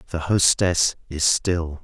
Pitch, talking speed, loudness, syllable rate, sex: 85 Hz, 130 wpm, -20 LUFS, 3.5 syllables/s, male